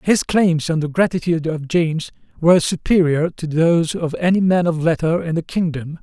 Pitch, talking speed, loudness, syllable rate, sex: 165 Hz, 190 wpm, -18 LUFS, 5.3 syllables/s, male